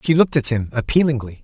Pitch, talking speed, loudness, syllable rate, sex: 130 Hz, 210 wpm, -18 LUFS, 6.9 syllables/s, male